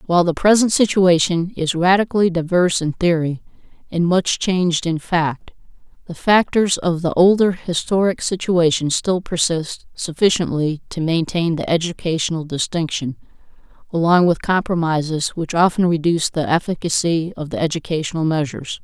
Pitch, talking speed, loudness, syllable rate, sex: 170 Hz, 130 wpm, -18 LUFS, 5.1 syllables/s, female